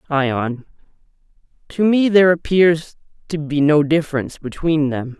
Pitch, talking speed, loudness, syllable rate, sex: 155 Hz, 125 wpm, -17 LUFS, 4.6 syllables/s, male